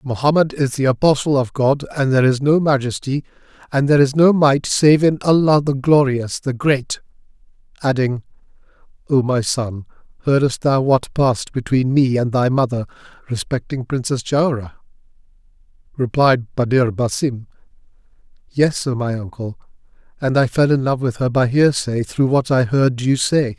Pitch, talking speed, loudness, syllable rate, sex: 130 Hz, 155 wpm, -17 LUFS, 4.8 syllables/s, male